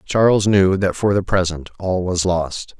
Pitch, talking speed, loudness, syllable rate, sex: 95 Hz, 195 wpm, -18 LUFS, 4.2 syllables/s, male